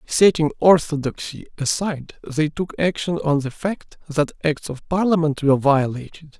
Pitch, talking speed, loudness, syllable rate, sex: 155 Hz, 140 wpm, -20 LUFS, 4.7 syllables/s, male